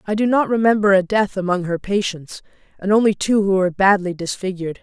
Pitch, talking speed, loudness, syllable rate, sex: 195 Hz, 200 wpm, -18 LUFS, 6.0 syllables/s, female